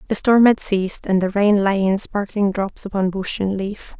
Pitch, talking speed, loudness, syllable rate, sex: 200 Hz, 225 wpm, -19 LUFS, 4.8 syllables/s, female